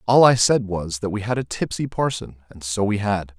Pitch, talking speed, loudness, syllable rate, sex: 105 Hz, 230 wpm, -21 LUFS, 5.1 syllables/s, male